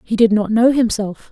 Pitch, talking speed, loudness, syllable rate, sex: 220 Hz, 230 wpm, -15 LUFS, 5.0 syllables/s, female